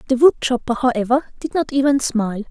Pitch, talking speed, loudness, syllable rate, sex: 255 Hz, 190 wpm, -18 LUFS, 6.0 syllables/s, female